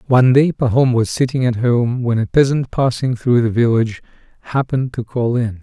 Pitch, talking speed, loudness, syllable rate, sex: 120 Hz, 190 wpm, -16 LUFS, 5.4 syllables/s, male